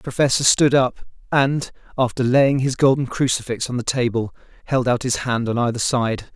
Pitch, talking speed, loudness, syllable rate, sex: 125 Hz, 190 wpm, -19 LUFS, 5.1 syllables/s, male